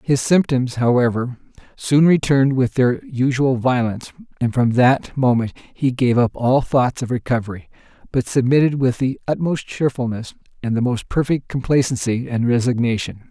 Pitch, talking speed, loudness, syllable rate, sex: 130 Hz, 150 wpm, -18 LUFS, 4.9 syllables/s, male